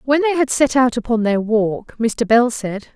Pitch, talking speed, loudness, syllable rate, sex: 240 Hz, 225 wpm, -17 LUFS, 4.4 syllables/s, female